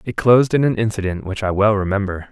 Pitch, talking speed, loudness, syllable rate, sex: 105 Hz, 235 wpm, -18 LUFS, 6.4 syllables/s, male